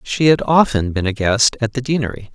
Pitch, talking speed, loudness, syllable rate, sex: 120 Hz, 230 wpm, -16 LUFS, 5.5 syllables/s, male